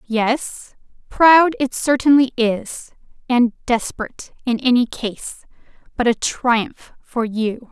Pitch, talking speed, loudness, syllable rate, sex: 245 Hz, 115 wpm, -18 LUFS, 3.4 syllables/s, female